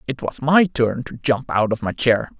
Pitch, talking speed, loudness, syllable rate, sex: 125 Hz, 250 wpm, -20 LUFS, 4.7 syllables/s, male